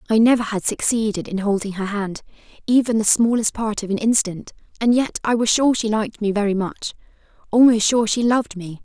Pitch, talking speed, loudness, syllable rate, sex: 215 Hz, 205 wpm, -19 LUFS, 5.7 syllables/s, female